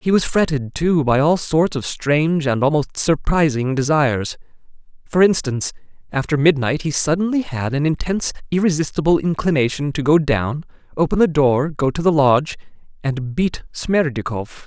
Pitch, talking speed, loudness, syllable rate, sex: 150 Hz, 150 wpm, -18 LUFS, 5.0 syllables/s, male